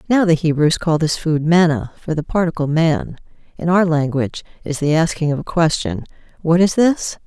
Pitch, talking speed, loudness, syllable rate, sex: 160 Hz, 190 wpm, -17 LUFS, 5.1 syllables/s, female